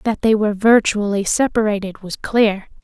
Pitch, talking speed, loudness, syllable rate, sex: 210 Hz, 150 wpm, -17 LUFS, 5.0 syllables/s, female